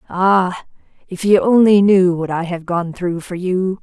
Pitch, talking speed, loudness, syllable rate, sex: 185 Hz, 190 wpm, -16 LUFS, 4.0 syllables/s, female